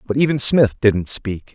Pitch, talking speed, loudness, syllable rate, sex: 115 Hz, 195 wpm, -17 LUFS, 4.4 syllables/s, male